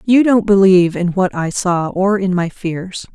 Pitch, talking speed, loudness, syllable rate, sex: 185 Hz, 210 wpm, -15 LUFS, 4.4 syllables/s, female